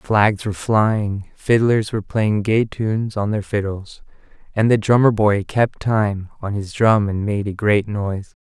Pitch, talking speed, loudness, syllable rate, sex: 105 Hz, 175 wpm, -19 LUFS, 4.2 syllables/s, male